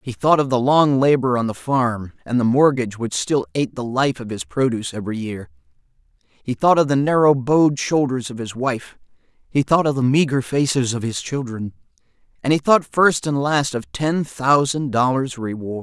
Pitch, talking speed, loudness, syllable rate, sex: 130 Hz, 195 wpm, -19 LUFS, 5.1 syllables/s, male